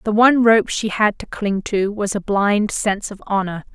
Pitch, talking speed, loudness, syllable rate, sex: 205 Hz, 225 wpm, -18 LUFS, 4.8 syllables/s, female